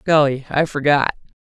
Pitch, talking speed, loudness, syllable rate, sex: 145 Hz, 125 wpm, -18 LUFS, 5.0 syllables/s, male